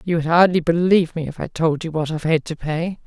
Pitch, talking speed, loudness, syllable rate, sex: 165 Hz, 275 wpm, -19 LUFS, 6.2 syllables/s, female